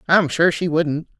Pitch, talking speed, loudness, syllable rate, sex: 160 Hz, 200 wpm, -19 LUFS, 4.2 syllables/s, female